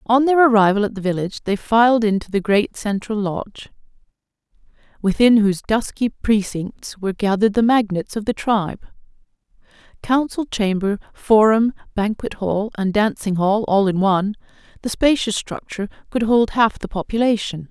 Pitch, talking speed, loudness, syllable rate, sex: 210 Hz, 145 wpm, -19 LUFS, 5.2 syllables/s, female